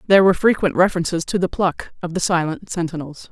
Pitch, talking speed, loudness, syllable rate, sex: 175 Hz, 200 wpm, -19 LUFS, 6.6 syllables/s, female